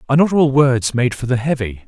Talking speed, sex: 255 wpm, male